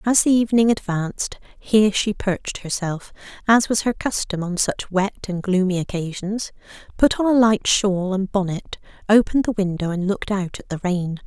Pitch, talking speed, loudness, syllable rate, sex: 200 Hz, 180 wpm, -21 LUFS, 5.1 syllables/s, female